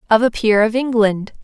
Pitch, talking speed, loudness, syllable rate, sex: 225 Hz, 210 wpm, -16 LUFS, 5.2 syllables/s, female